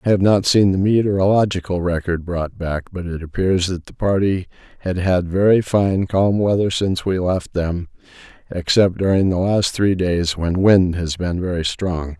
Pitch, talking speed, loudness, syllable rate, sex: 90 Hz, 180 wpm, -18 LUFS, 4.6 syllables/s, male